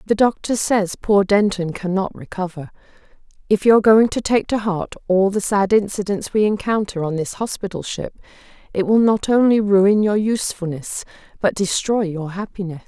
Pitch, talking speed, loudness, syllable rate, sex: 200 Hz, 165 wpm, -19 LUFS, 5.0 syllables/s, female